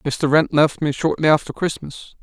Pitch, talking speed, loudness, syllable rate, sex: 150 Hz, 190 wpm, -18 LUFS, 4.7 syllables/s, male